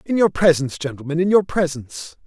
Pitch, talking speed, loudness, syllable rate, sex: 165 Hz, 185 wpm, -19 LUFS, 6.2 syllables/s, male